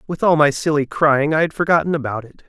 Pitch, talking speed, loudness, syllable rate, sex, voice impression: 150 Hz, 240 wpm, -17 LUFS, 6.1 syllables/s, male, very masculine, adult-like, slightly cool, sincere, slightly friendly